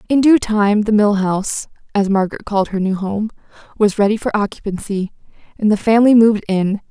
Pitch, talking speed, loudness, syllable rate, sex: 210 Hz, 185 wpm, -16 LUFS, 5.9 syllables/s, female